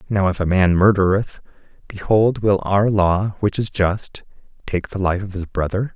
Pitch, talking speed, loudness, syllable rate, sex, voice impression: 100 Hz, 180 wpm, -19 LUFS, 4.5 syllables/s, male, very masculine, adult-like, slightly dark, sincere, very calm